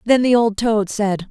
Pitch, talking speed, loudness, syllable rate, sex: 220 Hz, 230 wpm, -17 LUFS, 4.2 syllables/s, female